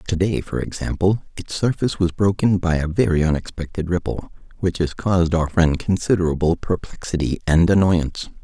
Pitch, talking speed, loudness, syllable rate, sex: 85 Hz, 150 wpm, -20 LUFS, 5.5 syllables/s, male